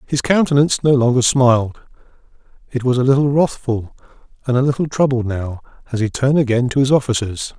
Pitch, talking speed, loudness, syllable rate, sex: 130 Hz, 175 wpm, -16 LUFS, 6.1 syllables/s, male